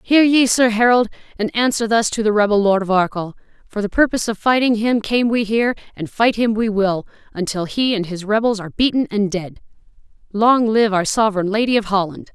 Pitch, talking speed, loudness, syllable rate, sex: 215 Hz, 210 wpm, -17 LUFS, 5.6 syllables/s, female